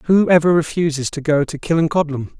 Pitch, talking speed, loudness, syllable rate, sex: 155 Hz, 175 wpm, -17 LUFS, 6.0 syllables/s, male